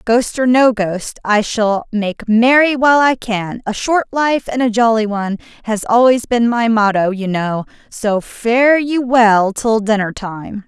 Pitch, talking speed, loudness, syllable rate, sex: 225 Hz, 175 wpm, -15 LUFS, 4.1 syllables/s, female